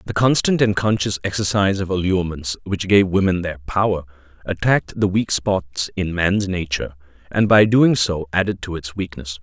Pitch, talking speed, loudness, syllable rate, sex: 95 Hz, 170 wpm, -19 LUFS, 5.2 syllables/s, male